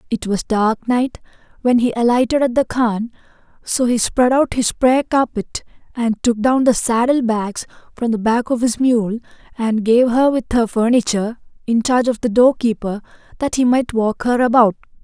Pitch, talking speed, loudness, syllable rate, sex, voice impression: 235 Hz, 190 wpm, -17 LUFS, 4.8 syllables/s, female, slightly feminine, adult-like, slightly raspy, unique, slightly kind